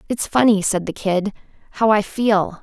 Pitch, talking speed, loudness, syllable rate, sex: 205 Hz, 185 wpm, -18 LUFS, 4.6 syllables/s, female